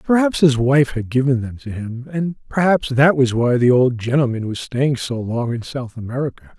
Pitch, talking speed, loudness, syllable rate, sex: 130 Hz, 210 wpm, -18 LUFS, 4.9 syllables/s, male